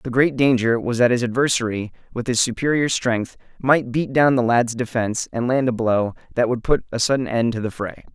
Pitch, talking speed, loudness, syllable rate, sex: 120 Hz, 220 wpm, -20 LUFS, 5.4 syllables/s, male